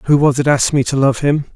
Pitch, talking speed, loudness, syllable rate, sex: 140 Hz, 310 wpm, -14 LUFS, 6.7 syllables/s, male